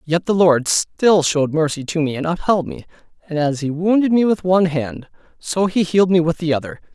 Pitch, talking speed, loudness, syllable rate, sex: 165 Hz, 225 wpm, -17 LUFS, 5.5 syllables/s, male